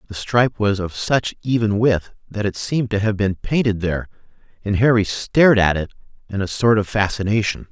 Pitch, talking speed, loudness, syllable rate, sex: 105 Hz, 195 wpm, -19 LUFS, 5.5 syllables/s, male